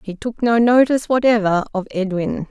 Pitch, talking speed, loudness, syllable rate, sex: 220 Hz, 165 wpm, -17 LUFS, 5.2 syllables/s, female